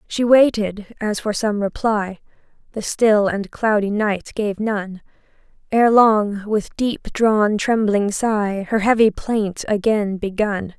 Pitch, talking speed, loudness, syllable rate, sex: 210 Hz, 135 wpm, -19 LUFS, 3.5 syllables/s, female